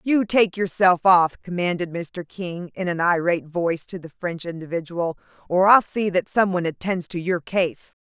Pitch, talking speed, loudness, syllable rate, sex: 180 Hz, 185 wpm, -22 LUFS, 4.9 syllables/s, female